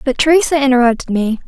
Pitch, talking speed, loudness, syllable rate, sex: 265 Hz, 160 wpm, -13 LUFS, 6.8 syllables/s, female